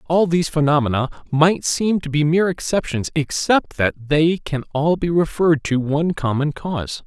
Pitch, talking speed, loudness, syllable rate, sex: 155 Hz, 170 wpm, -19 LUFS, 5.1 syllables/s, male